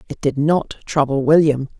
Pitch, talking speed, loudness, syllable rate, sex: 145 Hz, 165 wpm, -17 LUFS, 4.8 syllables/s, female